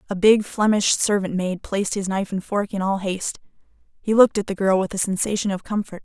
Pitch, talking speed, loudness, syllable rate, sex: 195 Hz, 230 wpm, -21 LUFS, 6.1 syllables/s, female